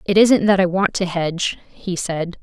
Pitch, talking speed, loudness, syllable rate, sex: 185 Hz, 225 wpm, -18 LUFS, 4.6 syllables/s, female